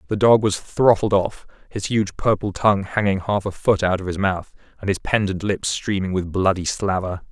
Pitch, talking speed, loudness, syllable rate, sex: 100 Hz, 205 wpm, -21 LUFS, 5.0 syllables/s, male